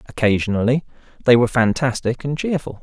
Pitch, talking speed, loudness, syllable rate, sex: 125 Hz, 125 wpm, -19 LUFS, 6.1 syllables/s, male